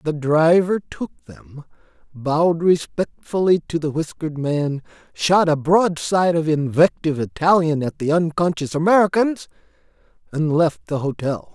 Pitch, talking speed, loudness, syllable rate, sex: 160 Hz, 125 wpm, -19 LUFS, 4.6 syllables/s, male